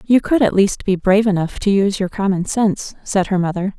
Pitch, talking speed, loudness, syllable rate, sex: 195 Hz, 240 wpm, -17 LUFS, 5.9 syllables/s, female